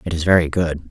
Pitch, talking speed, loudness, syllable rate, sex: 80 Hz, 265 wpm, -18 LUFS, 6.2 syllables/s, male